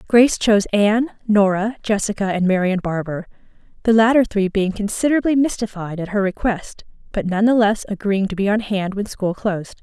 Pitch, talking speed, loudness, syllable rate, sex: 205 Hz, 165 wpm, -19 LUFS, 5.7 syllables/s, female